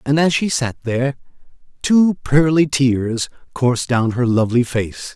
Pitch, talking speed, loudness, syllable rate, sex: 135 Hz, 150 wpm, -17 LUFS, 4.5 syllables/s, male